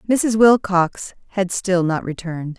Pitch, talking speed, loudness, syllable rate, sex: 190 Hz, 140 wpm, -18 LUFS, 4.2 syllables/s, female